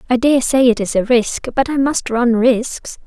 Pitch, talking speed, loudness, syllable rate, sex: 245 Hz, 235 wpm, -15 LUFS, 4.4 syllables/s, female